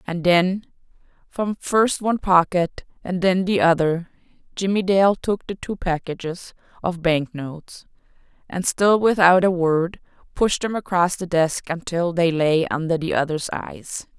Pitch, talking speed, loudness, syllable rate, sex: 180 Hz, 150 wpm, -21 LUFS, 4.2 syllables/s, female